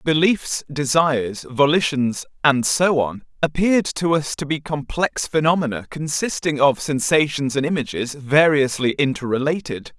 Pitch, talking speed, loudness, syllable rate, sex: 145 Hz, 120 wpm, -20 LUFS, 4.6 syllables/s, male